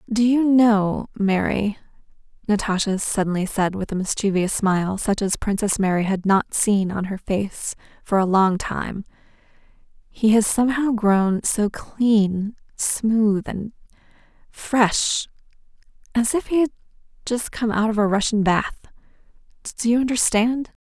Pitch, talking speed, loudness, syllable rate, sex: 210 Hz, 135 wpm, -21 LUFS, 4.2 syllables/s, female